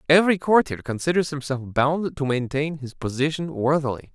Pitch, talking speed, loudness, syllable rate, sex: 145 Hz, 145 wpm, -23 LUFS, 5.3 syllables/s, male